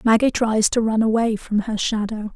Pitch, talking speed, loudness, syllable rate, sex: 220 Hz, 205 wpm, -20 LUFS, 4.9 syllables/s, female